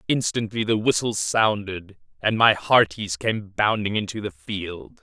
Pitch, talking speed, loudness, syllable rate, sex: 105 Hz, 145 wpm, -22 LUFS, 4.1 syllables/s, male